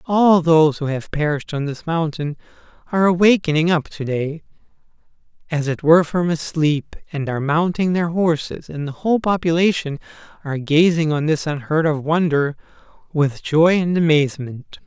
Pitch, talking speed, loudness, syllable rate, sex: 160 Hz, 155 wpm, -19 LUFS, 5.2 syllables/s, male